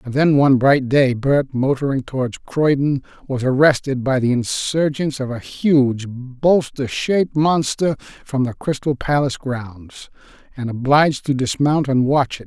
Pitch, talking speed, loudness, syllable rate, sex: 135 Hz, 155 wpm, -18 LUFS, 4.5 syllables/s, male